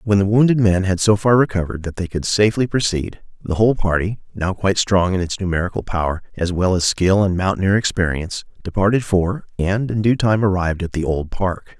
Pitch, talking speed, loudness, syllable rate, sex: 95 Hz, 210 wpm, -18 LUFS, 5.8 syllables/s, male